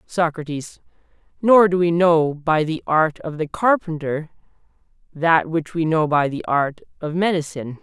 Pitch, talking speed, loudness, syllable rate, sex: 160 Hz, 155 wpm, -20 LUFS, 4.5 syllables/s, male